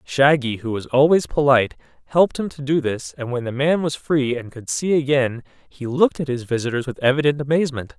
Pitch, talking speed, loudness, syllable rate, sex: 135 Hz, 210 wpm, -20 LUFS, 5.8 syllables/s, male